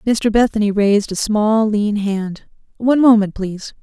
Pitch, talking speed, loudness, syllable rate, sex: 215 Hz, 155 wpm, -16 LUFS, 4.8 syllables/s, female